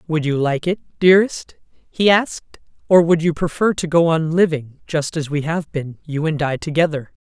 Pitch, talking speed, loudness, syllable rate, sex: 160 Hz, 200 wpm, -18 LUFS, 4.9 syllables/s, female